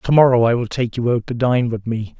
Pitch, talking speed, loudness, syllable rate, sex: 120 Hz, 300 wpm, -18 LUFS, 5.6 syllables/s, male